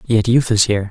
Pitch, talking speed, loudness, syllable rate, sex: 110 Hz, 265 wpm, -15 LUFS, 6.5 syllables/s, male